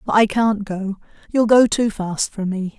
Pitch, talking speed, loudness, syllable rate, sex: 210 Hz, 215 wpm, -19 LUFS, 4.2 syllables/s, female